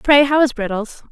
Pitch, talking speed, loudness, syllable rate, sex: 255 Hz, 215 wpm, -16 LUFS, 5.2 syllables/s, female